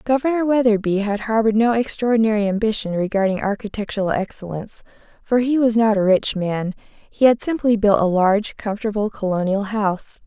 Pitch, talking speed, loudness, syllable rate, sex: 215 Hz, 150 wpm, -19 LUFS, 5.7 syllables/s, female